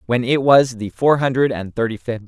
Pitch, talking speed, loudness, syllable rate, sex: 125 Hz, 265 wpm, -17 LUFS, 5.6 syllables/s, male